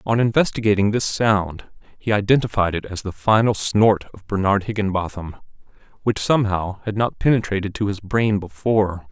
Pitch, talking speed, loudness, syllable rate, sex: 105 Hz, 150 wpm, -20 LUFS, 5.2 syllables/s, male